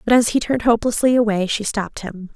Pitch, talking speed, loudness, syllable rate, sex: 220 Hz, 230 wpm, -18 LUFS, 6.7 syllables/s, female